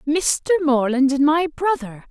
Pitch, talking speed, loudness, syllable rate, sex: 290 Hz, 140 wpm, -19 LUFS, 4.2 syllables/s, female